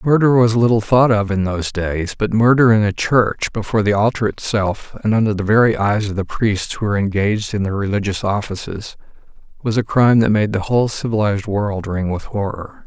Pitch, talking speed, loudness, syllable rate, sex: 105 Hz, 205 wpm, -17 LUFS, 5.6 syllables/s, male